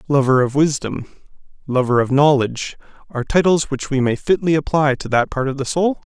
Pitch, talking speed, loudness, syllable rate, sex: 140 Hz, 185 wpm, -18 LUFS, 5.6 syllables/s, male